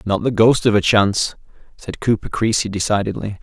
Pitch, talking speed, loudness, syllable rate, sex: 105 Hz, 175 wpm, -17 LUFS, 5.5 syllables/s, male